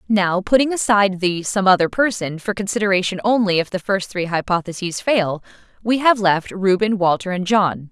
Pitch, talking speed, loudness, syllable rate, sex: 195 Hz, 175 wpm, -18 LUFS, 5.2 syllables/s, female